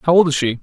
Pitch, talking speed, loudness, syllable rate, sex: 150 Hz, 385 wpm, -15 LUFS, 6.9 syllables/s, male